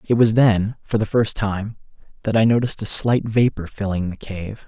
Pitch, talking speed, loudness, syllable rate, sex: 110 Hz, 205 wpm, -20 LUFS, 5.0 syllables/s, male